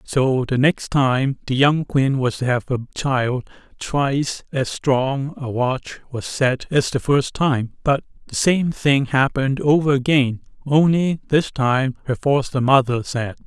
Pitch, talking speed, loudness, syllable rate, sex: 135 Hz, 165 wpm, -19 LUFS, 3.9 syllables/s, male